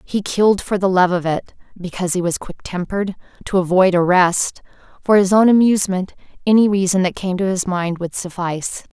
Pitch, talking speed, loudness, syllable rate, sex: 185 Hz, 170 wpm, -17 LUFS, 5.6 syllables/s, female